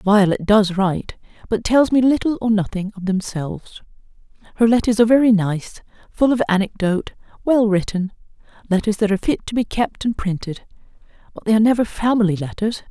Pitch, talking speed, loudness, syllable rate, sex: 210 Hz, 165 wpm, -18 LUFS, 5.8 syllables/s, female